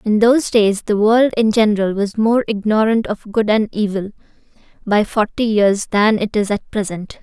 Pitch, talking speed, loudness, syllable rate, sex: 215 Hz, 185 wpm, -16 LUFS, 4.8 syllables/s, female